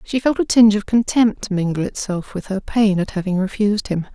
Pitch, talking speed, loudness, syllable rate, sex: 205 Hz, 215 wpm, -18 LUFS, 5.5 syllables/s, female